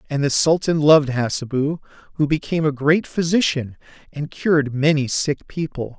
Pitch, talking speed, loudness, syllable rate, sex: 145 Hz, 150 wpm, -19 LUFS, 5.1 syllables/s, male